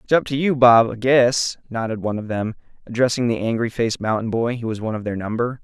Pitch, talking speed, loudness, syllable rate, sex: 115 Hz, 245 wpm, -20 LUFS, 6.3 syllables/s, male